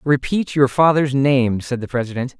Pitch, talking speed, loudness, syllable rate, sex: 135 Hz, 175 wpm, -18 LUFS, 4.8 syllables/s, male